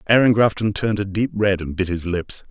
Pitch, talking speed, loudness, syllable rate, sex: 100 Hz, 240 wpm, -20 LUFS, 5.8 syllables/s, male